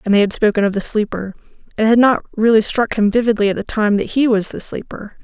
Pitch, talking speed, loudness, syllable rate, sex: 215 Hz, 250 wpm, -16 LUFS, 6.0 syllables/s, female